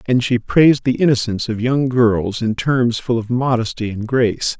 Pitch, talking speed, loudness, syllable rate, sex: 120 Hz, 195 wpm, -17 LUFS, 4.9 syllables/s, male